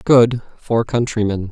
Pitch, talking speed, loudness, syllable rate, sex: 115 Hz, 120 wpm, -17 LUFS, 3.9 syllables/s, male